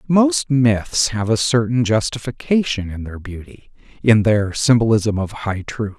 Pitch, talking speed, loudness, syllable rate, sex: 115 Hz, 150 wpm, -18 LUFS, 4.2 syllables/s, male